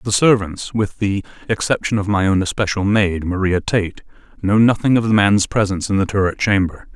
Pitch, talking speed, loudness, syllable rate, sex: 100 Hz, 175 wpm, -17 LUFS, 5.3 syllables/s, male